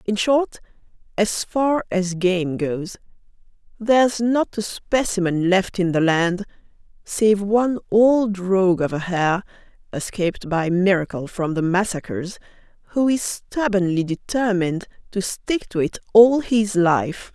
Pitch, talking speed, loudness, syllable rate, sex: 195 Hz, 135 wpm, -20 LUFS, 4.0 syllables/s, female